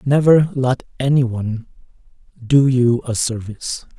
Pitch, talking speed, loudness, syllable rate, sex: 125 Hz, 120 wpm, -17 LUFS, 4.6 syllables/s, male